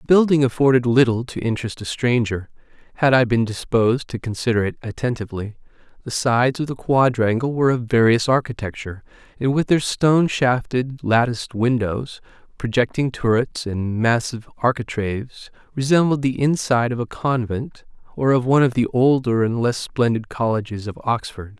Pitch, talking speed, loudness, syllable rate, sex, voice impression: 120 Hz, 155 wpm, -20 LUFS, 5.4 syllables/s, male, masculine, adult-like, tensed, powerful, slightly bright, clear, intellectual, mature, friendly, slightly reassuring, wild, lively, slightly kind